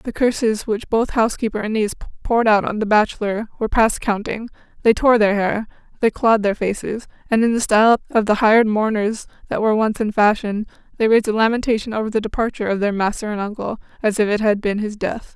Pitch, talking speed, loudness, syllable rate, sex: 215 Hz, 215 wpm, -19 LUFS, 6.3 syllables/s, female